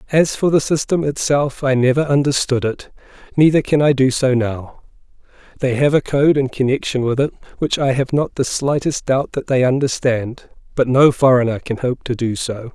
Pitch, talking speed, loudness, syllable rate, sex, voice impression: 135 Hz, 195 wpm, -17 LUFS, 5.0 syllables/s, male, masculine, very adult-like, slightly cool, intellectual, elegant